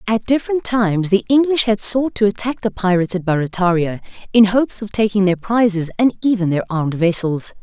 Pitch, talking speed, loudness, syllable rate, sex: 205 Hz, 190 wpm, -17 LUFS, 5.8 syllables/s, female